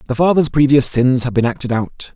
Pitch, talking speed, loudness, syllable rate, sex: 130 Hz, 225 wpm, -15 LUFS, 5.6 syllables/s, male